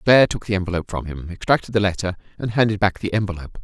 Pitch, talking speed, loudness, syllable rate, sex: 100 Hz, 230 wpm, -21 LUFS, 7.5 syllables/s, male